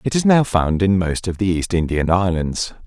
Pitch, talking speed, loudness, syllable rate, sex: 95 Hz, 230 wpm, -18 LUFS, 4.9 syllables/s, male